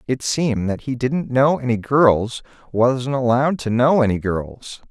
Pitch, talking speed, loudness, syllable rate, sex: 125 Hz, 160 wpm, -19 LUFS, 4.3 syllables/s, male